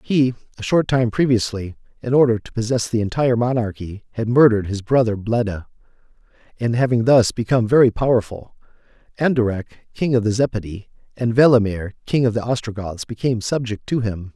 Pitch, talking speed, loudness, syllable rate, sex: 115 Hz, 160 wpm, -19 LUFS, 5.9 syllables/s, male